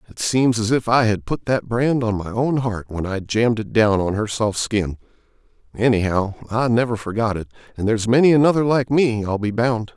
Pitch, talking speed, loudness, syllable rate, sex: 115 Hz, 215 wpm, -19 LUFS, 5.3 syllables/s, male